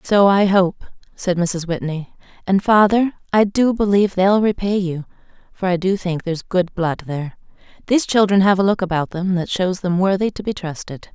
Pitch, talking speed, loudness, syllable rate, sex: 190 Hz, 195 wpm, -18 LUFS, 5.2 syllables/s, female